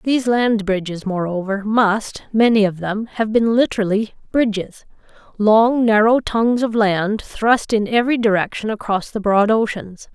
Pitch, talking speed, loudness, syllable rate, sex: 215 Hz, 150 wpm, -18 LUFS, 4.5 syllables/s, female